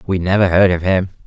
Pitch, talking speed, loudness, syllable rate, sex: 95 Hz, 235 wpm, -15 LUFS, 6.1 syllables/s, male